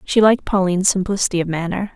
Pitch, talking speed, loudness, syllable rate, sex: 190 Hz, 185 wpm, -18 LUFS, 7.0 syllables/s, female